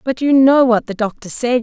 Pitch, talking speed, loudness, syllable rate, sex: 245 Hz, 260 wpm, -14 LUFS, 5.1 syllables/s, female